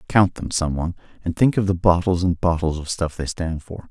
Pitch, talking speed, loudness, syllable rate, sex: 85 Hz, 245 wpm, -21 LUFS, 5.5 syllables/s, male